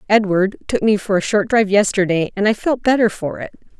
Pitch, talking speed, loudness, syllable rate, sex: 205 Hz, 220 wpm, -17 LUFS, 5.9 syllables/s, female